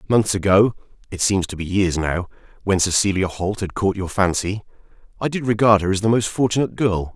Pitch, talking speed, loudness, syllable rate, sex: 100 Hz, 185 wpm, -20 LUFS, 5.7 syllables/s, male